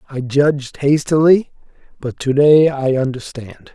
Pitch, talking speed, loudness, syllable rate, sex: 140 Hz, 130 wpm, -15 LUFS, 4.3 syllables/s, male